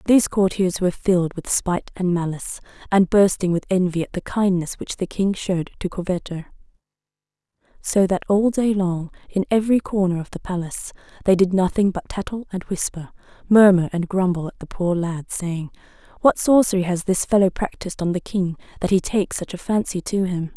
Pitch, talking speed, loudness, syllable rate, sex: 185 Hz, 185 wpm, -21 LUFS, 5.6 syllables/s, female